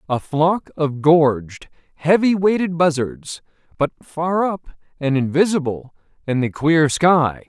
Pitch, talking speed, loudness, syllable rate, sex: 155 Hz, 130 wpm, -18 LUFS, 3.9 syllables/s, male